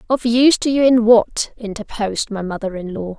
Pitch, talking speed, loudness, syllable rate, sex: 220 Hz, 205 wpm, -17 LUFS, 5.4 syllables/s, female